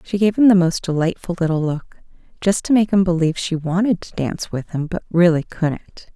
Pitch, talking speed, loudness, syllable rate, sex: 175 Hz, 215 wpm, -19 LUFS, 5.4 syllables/s, female